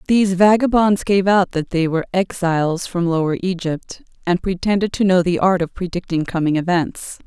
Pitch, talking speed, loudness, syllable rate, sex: 180 Hz, 175 wpm, -18 LUFS, 5.2 syllables/s, female